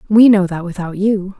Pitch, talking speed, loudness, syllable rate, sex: 195 Hz, 215 wpm, -14 LUFS, 5.0 syllables/s, female